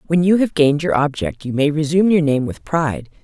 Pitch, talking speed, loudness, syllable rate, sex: 150 Hz, 240 wpm, -17 LUFS, 6.1 syllables/s, female